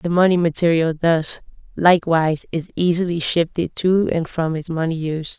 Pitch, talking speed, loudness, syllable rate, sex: 165 Hz, 155 wpm, -19 LUFS, 5.1 syllables/s, female